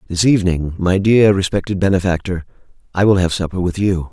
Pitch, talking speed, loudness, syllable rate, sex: 95 Hz, 175 wpm, -16 LUFS, 5.9 syllables/s, male